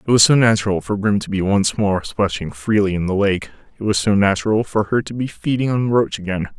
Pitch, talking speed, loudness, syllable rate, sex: 100 Hz, 245 wpm, -18 LUFS, 5.6 syllables/s, male